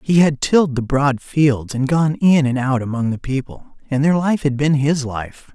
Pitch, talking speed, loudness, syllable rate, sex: 140 Hz, 225 wpm, -18 LUFS, 4.5 syllables/s, male